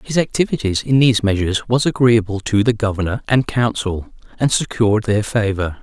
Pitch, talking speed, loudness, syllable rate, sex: 110 Hz, 165 wpm, -17 LUFS, 5.6 syllables/s, male